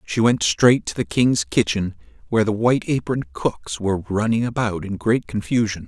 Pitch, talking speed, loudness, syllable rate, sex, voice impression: 105 Hz, 185 wpm, -21 LUFS, 5.2 syllables/s, male, masculine, middle-aged, slightly bright, halting, raspy, sincere, slightly mature, friendly, kind, modest